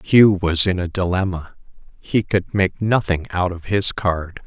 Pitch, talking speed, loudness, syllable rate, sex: 90 Hz, 175 wpm, -19 LUFS, 4.1 syllables/s, male